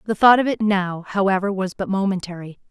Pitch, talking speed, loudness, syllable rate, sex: 195 Hz, 200 wpm, -20 LUFS, 5.9 syllables/s, female